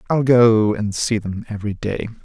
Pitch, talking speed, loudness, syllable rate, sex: 110 Hz, 190 wpm, -18 LUFS, 4.8 syllables/s, male